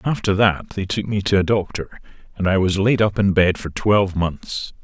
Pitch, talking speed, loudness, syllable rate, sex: 95 Hz, 225 wpm, -19 LUFS, 4.9 syllables/s, male